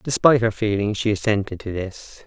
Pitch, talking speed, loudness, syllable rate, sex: 105 Hz, 185 wpm, -21 LUFS, 5.4 syllables/s, male